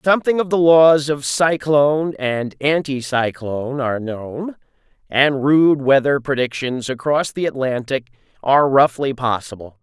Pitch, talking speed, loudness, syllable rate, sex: 140 Hz, 120 wpm, -17 LUFS, 4.4 syllables/s, male